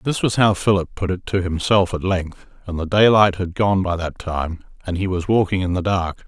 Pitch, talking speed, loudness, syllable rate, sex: 95 Hz, 240 wpm, -19 LUFS, 5.1 syllables/s, male